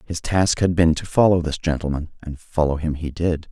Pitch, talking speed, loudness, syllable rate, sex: 80 Hz, 220 wpm, -21 LUFS, 5.2 syllables/s, male